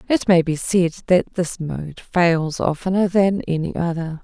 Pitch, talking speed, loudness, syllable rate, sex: 175 Hz, 170 wpm, -20 LUFS, 4.1 syllables/s, female